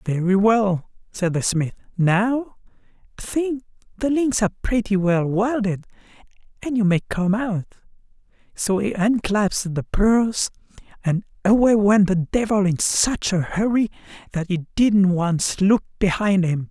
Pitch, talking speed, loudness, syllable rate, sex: 205 Hz, 145 wpm, -20 LUFS, 4.3 syllables/s, male